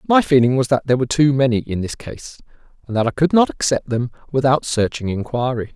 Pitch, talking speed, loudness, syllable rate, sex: 130 Hz, 220 wpm, -18 LUFS, 6.1 syllables/s, male